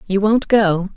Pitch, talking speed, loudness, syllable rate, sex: 200 Hz, 190 wpm, -16 LUFS, 4.0 syllables/s, female